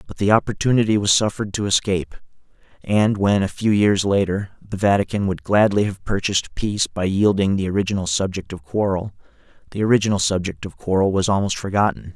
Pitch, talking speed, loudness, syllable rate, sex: 100 Hz, 175 wpm, -20 LUFS, 6.0 syllables/s, male